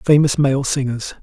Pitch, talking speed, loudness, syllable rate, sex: 135 Hz, 145 wpm, -17 LUFS, 4.7 syllables/s, male